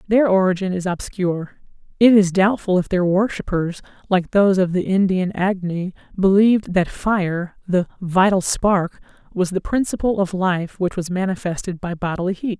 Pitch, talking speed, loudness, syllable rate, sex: 185 Hz, 155 wpm, -19 LUFS, 4.8 syllables/s, female